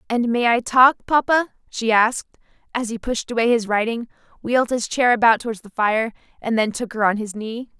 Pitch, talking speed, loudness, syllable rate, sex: 230 Hz, 210 wpm, -20 LUFS, 5.5 syllables/s, female